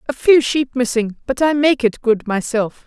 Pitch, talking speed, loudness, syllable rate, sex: 250 Hz, 210 wpm, -17 LUFS, 4.7 syllables/s, female